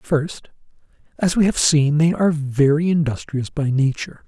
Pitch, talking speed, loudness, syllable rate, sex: 150 Hz, 155 wpm, -19 LUFS, 4.8 syllables/s, male